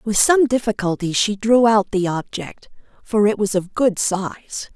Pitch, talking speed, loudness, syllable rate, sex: 210 Hz, 175 wpm, -18 LUFS, 4.2 syllables/s, female